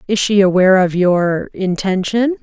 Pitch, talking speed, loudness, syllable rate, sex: 195 Hz, 125 wpm, -14 LUFS, 4.6 syllables/s, female